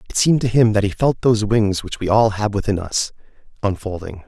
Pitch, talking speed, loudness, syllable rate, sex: 105 Hz, 225 wpm, -18 LUFS, 5.9 syllables/s, male